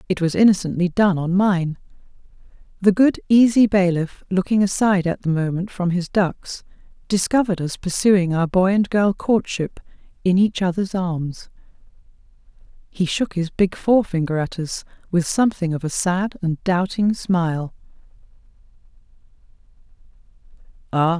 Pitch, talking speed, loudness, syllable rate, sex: 185 Hz, 125 wpm, -20 LUFS, 4.8 syllables/s, female